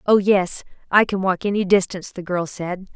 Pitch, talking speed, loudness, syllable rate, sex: 190 Hz, 205 wpm, -20 LUFS, 5.2 syllables/s, female